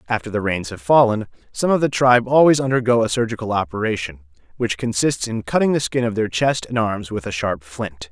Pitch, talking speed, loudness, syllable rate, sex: 110 Hz, 215 wpm, -19 LUFS, 5.7 syllables/s, male